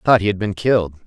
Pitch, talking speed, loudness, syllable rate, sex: 100 Hz, 340 wpm, -18 LUFS, 8.1 syllables/s, male